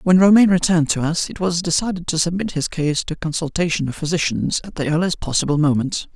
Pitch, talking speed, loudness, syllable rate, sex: 165 Hz, 215 wpm, -19 LUFS, 6.3 syllables/s, male